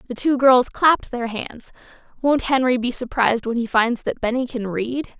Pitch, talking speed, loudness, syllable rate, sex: 245 Hz, 195 wpm, -20 LUFS, 4.9 syllables/s, female